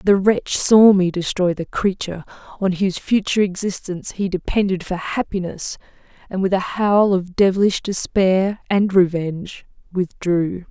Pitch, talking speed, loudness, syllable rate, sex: 190 Hz, 140 wpm, -19 LUFS, 4.7 syllables/s, female